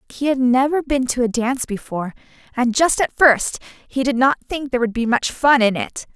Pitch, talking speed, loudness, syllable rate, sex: 255 Hz, 225 wpm, -18 LUFS, 5.4 syllables/s, female